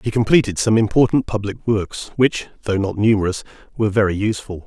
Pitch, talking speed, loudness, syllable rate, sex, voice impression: 105 Hz, 165 wpm, -19 LUFS, 6.0 syllables/s, male, masculine, adult-like, slightly dark, slightly muffled, cool, slightly refreshing, sincere